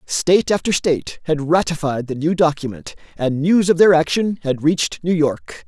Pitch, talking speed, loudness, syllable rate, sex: 160 Hz, 180 wpm, -18 LUFS, 5.0 syllables/s, male